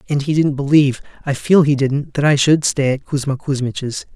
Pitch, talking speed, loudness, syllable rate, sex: 140 Hz, 215 wpm, -17 LUFS, 5.2 syllables/s, male